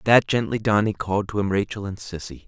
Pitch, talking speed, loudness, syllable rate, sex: 100 Hz, 240 wpm, -23 LUFS, 6.0 syllables/s, male